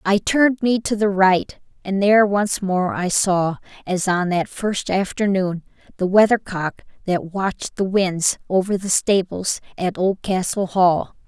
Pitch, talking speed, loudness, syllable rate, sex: 190 Hz, 155 wpm, -19 LUFS, 4.1 syllables/s, female